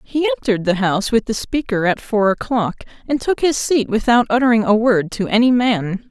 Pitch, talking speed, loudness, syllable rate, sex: 230 Hz, 205 wpm, -17 LUFS, 5.5 syllables/s, female